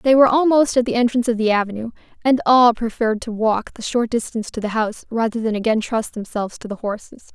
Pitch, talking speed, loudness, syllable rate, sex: 230 Hz, 230 wpm, -19 LUFS, 6.5 syllables/s, female